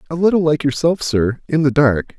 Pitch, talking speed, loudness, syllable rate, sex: 145 Hz, 190 wpm, -16 LUFS, 5.3 syllables/s, male